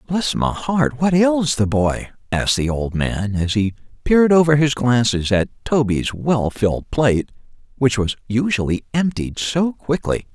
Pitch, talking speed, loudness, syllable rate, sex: 125 Hz, 160 wpm, -19 LUFS, 4.4 syllables/s, male